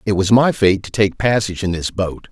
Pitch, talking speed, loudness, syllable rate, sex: 100 Hz, 260 wpm, -17 LUFS, 5.5 syllables/s, male